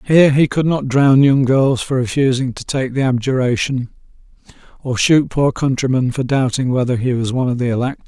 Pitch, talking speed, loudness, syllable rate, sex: 130 Hz, 195 wpm, -16 LUFS, 5.4 syllables/s, male